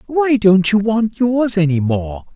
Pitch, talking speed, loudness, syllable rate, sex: 200 Hz, 180 wpm, -15 LUFS, 3.8 syllables/s, male